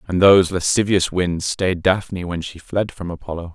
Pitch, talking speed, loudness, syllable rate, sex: 90 Hz, 185 wpm, -19 LUFS, 5.0 syllables/s, male